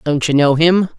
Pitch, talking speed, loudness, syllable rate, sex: 155 Hz, 245 wpm, -13 LUFS, 4.8 syllables/s, female